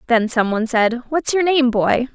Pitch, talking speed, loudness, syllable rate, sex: 250 Hz, 195 wpm, -17 LUFS, 4.9 syllables/s, female